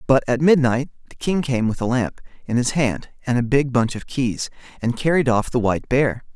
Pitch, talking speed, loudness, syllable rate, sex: 125 Hz, 225 wpm, -21 LUFS, 5.2 syllables/s, male